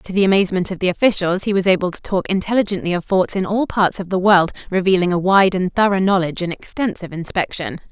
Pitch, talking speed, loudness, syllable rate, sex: 190 Hz, 220 wpm, -18 LUFS, 6.5 syllables/s, female